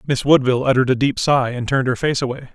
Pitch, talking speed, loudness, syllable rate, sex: 130 Hz, 260 wpm, -18 LUFS, 7.4 syllables/s, male